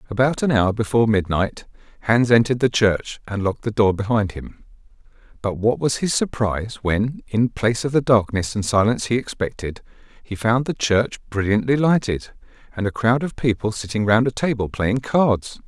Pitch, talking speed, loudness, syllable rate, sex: 115 Hz, 180 wpm, -20 LUFS, 5.2 syllables/s, male